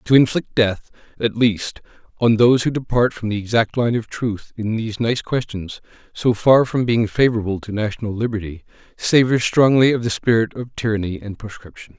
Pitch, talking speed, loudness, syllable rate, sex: 115 Hz, 180 wpm, -19 LUFS, 5.3 syllables/s, male